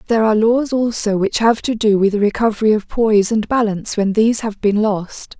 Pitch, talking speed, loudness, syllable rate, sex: 215 Hz, 225 wpm, -16 LUFS, 5.8 syllables/s, female